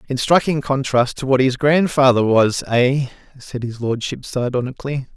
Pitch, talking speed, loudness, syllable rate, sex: 130 Hz, 150 wpm, -18 LUFS, 4.8 syllables/s, male